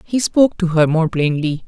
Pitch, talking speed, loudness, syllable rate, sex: 175 Hz, 215 wpm, -16 LUFS, 5.1 syllables/s, male